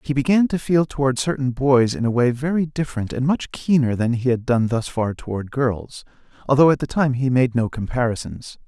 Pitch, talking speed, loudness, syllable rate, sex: 130 Hz, 215 wpm, -20 LUFS, 5.4 syllables/s, male